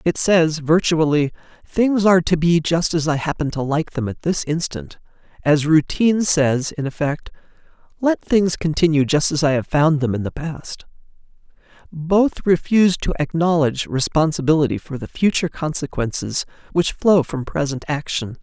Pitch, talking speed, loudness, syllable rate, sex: 160 Hz, 155 wpm, -19 LUFS, 4.9 syllables/s, male